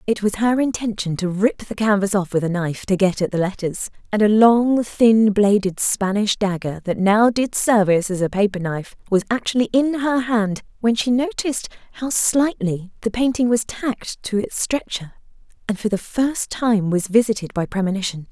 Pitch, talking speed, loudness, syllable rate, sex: 210 Hz, 190 wpm, -19 LUFS, 5.0 syllables/s, female